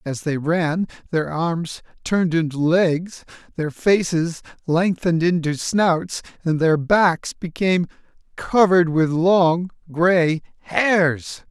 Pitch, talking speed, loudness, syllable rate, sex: 170 Hz, 115 wpm, -20 LUFS, 3.5 syllables/s, male